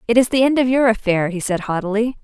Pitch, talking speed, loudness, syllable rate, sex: 225 Hz, 270 wpm, -17 LUFS, 6.4 syllables/s, female